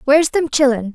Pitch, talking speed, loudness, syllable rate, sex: 275 Hz, 190 wpm, -15 LUFS, 6.0 syllables/s, female